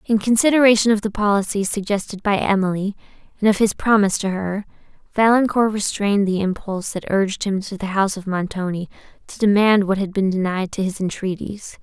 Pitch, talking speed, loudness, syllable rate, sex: 200 Hz, 180 wpm, -19 LUFS, 5.9 syllables/s, female